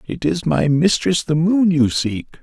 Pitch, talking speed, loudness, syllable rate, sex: 150 Hz, 200 wpm, -17 LUFS, 4.2 syllables/s, male